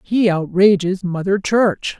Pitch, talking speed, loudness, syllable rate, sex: 190 Hz, 120 wpm, -17 LUFS, 3.7 syllables/s, female